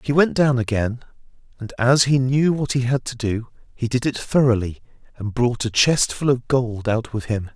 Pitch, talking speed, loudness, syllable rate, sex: 125 Hz, 215 wpm, -20 LUFS, 4.8 syllables/s, male